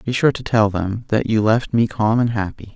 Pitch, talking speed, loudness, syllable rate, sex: 110 Hz, 260 wpm, -19 LUFS, 4.9 syllables/s, male